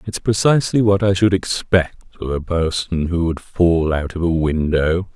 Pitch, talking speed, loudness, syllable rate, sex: 90 Hz, 185 wpm, -18 LUFS, 4.4 syllables/s, male